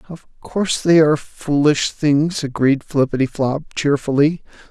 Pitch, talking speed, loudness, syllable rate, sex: 145 Hz, 115 wpm, -17 LUFS, 4.5 syllables/s, male